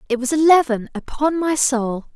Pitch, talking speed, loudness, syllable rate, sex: 270 Hz, 165 wpm, -18 LUFS, 4.7 syllables/s, female